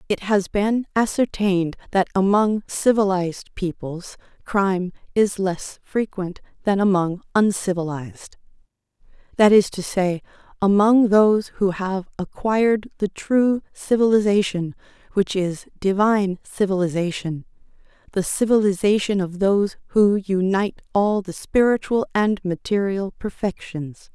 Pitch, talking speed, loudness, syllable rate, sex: 195 Hz, 100 wpm, -21 LUFS, 4.4 syllables/s, female